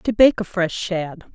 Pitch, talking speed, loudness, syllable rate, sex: 190 Hz, 225 wpm, -20 LUFS, 4.0 syllables/s, female